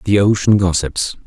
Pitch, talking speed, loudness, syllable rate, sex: 95 Hz, 140 wpm, -15 LUFS, 4.3 syllables/s, male